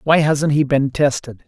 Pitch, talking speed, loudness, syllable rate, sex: 145 Hz, 205 wpm, -17 LUFS, 4.4 syllables/s, male